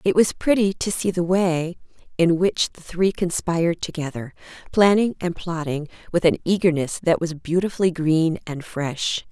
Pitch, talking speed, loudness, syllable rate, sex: 170 Hz, 160 wpm, -22 LUFS, 4.7 syllables/s, female